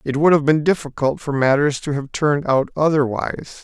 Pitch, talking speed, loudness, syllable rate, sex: 145 Hz, 200 wpm, -18 LUFS, 5.5 syllables/s, male